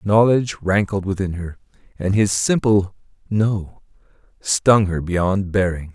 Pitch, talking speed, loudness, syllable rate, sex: 100 Hz, 130 wpm, -19 LUFS, 4.2 syllables/s, male